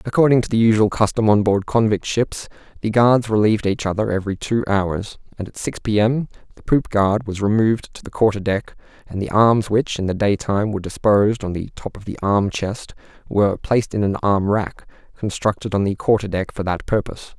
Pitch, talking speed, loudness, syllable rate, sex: 105 Hz, 205 wpm, -19 LUFS, 5.7 syllables/s, male